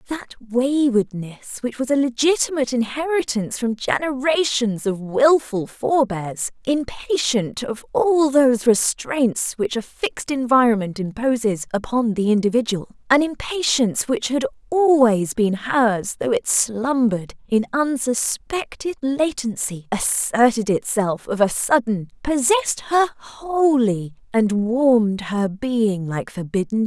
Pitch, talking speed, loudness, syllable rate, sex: 240 Hz, 120 wpm, -20 LUFS, 4.4 syllables/s, female